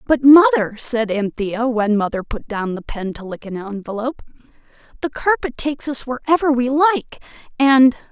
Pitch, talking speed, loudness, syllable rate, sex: 250 Hz, 155 wpm, -18 LUFS, 5.0 syllables/s, female